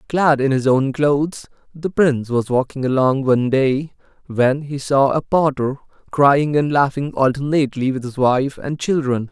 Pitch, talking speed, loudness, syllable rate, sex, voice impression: 135 Hz, 165 wpm, -18 LUFS, 4.6 syllables/s, male, slightly masculine, slightly adult-like, refreshing, friendly, slightly kind